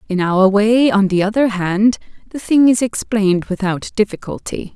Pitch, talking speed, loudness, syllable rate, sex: 210 Hz, 165 wpm, -15 LUFS, 4.8 syllables/s, female